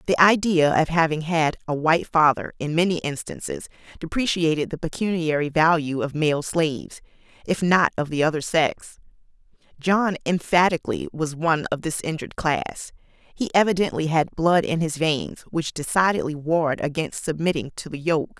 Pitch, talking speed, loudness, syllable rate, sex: 160 Hz, 155 wpm, -22 LUFS, 5.2 syllables/s, female